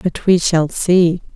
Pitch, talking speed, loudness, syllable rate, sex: 170 Hz, 175 wpm, -15 LUFS, 3.3 syllables/s, female